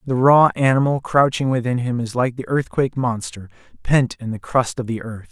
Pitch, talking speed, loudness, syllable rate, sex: 125 Hz, 205 wpm, -19 LUFS, 5.3 syllables/s, male